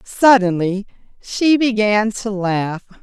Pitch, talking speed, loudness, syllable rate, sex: 210 Hz, 100 wpm, -16 LUFS, 3.8 syllables/s, female